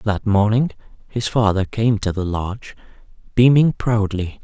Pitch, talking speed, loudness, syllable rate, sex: 105 Hz, 135 wpm, -19 LUFS, 4.4 syllables/s, male